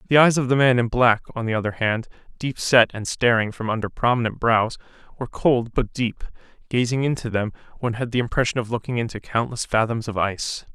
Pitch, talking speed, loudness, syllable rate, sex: 115 Hz, 205 wpm, -22 LUFS, 5.8 syllables/s, male